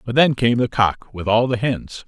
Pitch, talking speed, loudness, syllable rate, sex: 120 Hz, 260 wpm, -19 LUFS, 4.6 syllables/s, male